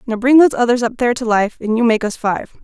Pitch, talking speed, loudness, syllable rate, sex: 235 Hz, 295 wpm, -15 LUFS, 6.6 syllables/s, female